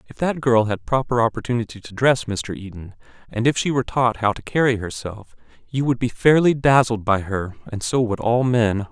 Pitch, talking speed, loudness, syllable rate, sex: 115 Hz, 210 wpm, -20 LUFS, 5.2 syllables/s, male